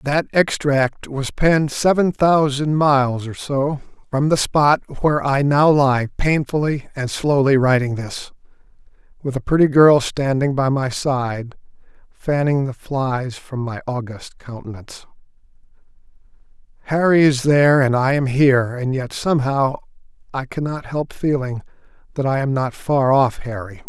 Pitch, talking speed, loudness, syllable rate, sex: 135 Hz, 145 wpm, -18 LUFS, 4.4 syllables/s, male